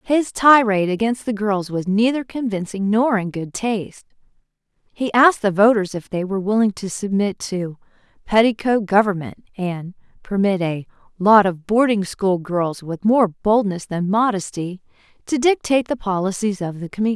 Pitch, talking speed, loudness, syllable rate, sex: 205 Hz, 155 wpm, -19 LUFS, 5.0 syllables/s, female